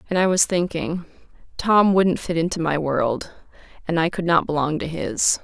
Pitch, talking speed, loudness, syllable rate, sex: 170 Hz, 190 wpm, -21 LUFS, 5.0 syllables/s, female